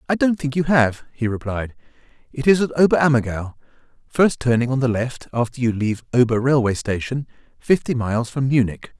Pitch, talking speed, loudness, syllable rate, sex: 125 Hz, 175 wpm, -20 LUFS, 5.6 syllables/s, male